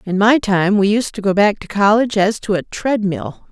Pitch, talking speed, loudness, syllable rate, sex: 205 Hz, 240 wpm, -16 LUFS, 5.1 syllables/s, female